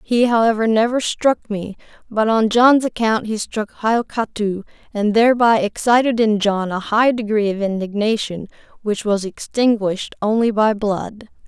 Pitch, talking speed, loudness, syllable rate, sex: 220 Hz, 145 wpm, -18 LUFS, 4.6 syllables/s, female